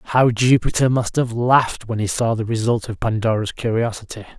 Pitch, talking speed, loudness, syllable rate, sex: 115 Hz, 180 wpm, -19 LUFS, 5.2 syllables/s, male